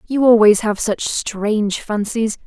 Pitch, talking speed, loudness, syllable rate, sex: 215 Hz, 145 wpm, -17 LUFS, 4.0 syllables/s, female